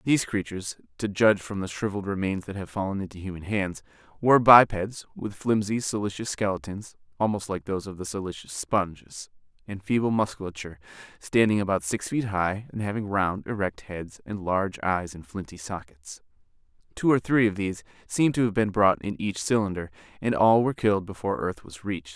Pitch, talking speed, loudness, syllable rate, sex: 100 Hz, 180 wpm, -26 LUFS, 5.3 syllables/s, male